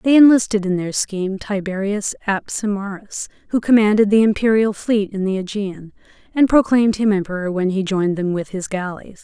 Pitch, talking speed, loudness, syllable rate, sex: 205 Hz, 170 wpm, -18 LUFS, 5.4 syllables/s, female